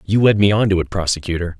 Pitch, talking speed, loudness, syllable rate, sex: 95 Hz, 265 wpm, -17 LUFS, 6.8 syllables/s, male